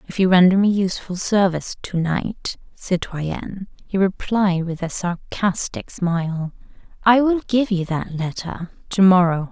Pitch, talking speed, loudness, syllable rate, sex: 185 Hz, 145 wpm, -20 LUFS, 4.3 syllables/s, female